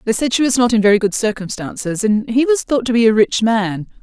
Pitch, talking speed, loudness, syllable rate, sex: 225 Hz, 270 wpm, -16 LUFS, 5.8 syllables/s, female